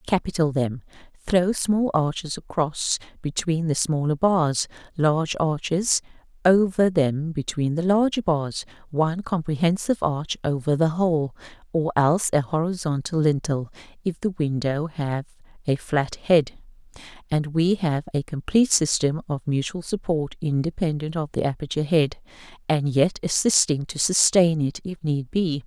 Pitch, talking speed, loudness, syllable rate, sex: 160 Hz, 140 wpm, -23 LUFS, 4.6 syllables/s, female